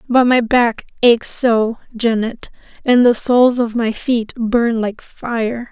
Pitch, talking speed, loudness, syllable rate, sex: 235 Hz, 155 wpm, -16 LUFS, 3.8 syllables/s, female